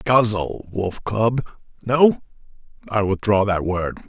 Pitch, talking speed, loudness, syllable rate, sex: 105 Hz, 120 wpm, -20 LUFS, 3.6 syllables/s, male